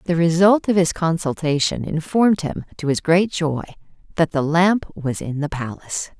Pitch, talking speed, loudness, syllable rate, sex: 165 Hz, 175 wpm, -20 LUFS, 4.9 syllables/s, female